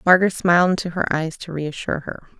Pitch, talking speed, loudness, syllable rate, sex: 170 Hz, 225 wpm, -20 LUFS, 6.9 syllables/s, female